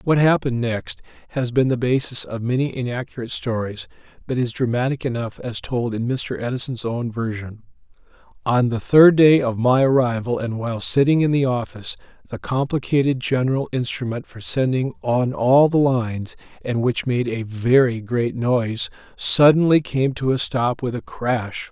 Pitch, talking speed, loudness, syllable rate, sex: 125 Hz, 165 wpm, -20 LUFS, 4.9 syllables/s, male